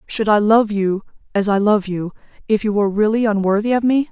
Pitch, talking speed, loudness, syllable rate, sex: 210 Hz, 220 wpm, -17 LUFS, 5.8 syllables/s, female